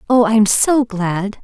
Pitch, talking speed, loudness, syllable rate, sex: 220 Hz, 165 wpm, -15 LUFS, 3.3 syllables/s, female